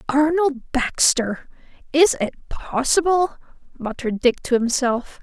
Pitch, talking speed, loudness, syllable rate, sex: 275 Hz, 105 wpm, -20 LUFS, 4.1 syllables/s, female